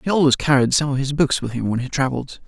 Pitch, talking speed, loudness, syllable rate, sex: 135 Hz, 290 wpm, -19 LUFS, 6.8 syllables/s, male